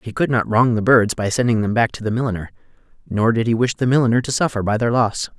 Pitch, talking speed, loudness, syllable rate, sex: 115 Hz, 265 wpm, -18 LUFS, 6.4 syllables/s, male